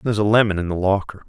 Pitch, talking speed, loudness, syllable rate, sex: 100 Hz, 280 wpm, -19 LUFS, 7.8 syllables/s, male